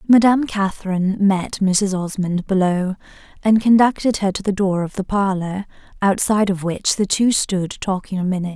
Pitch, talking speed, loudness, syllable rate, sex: 195 Hz, 170 wpm, -19 LUFS, 5.2 syllables/s, female